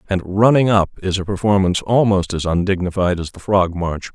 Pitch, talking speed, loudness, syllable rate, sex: 95 Hz, 190 wpm, -17 LUFS, 5.5 syllables/s, male